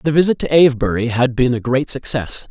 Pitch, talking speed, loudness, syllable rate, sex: 130 Hz, 215 wpm, -16 LUFS, 5.9 syllables/s, male